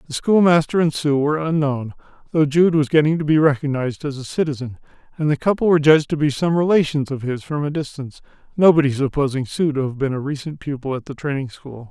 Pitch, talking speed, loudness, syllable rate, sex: 145 Hz, 215 wpm, -19 LUFS, 6.3 syllables/s, male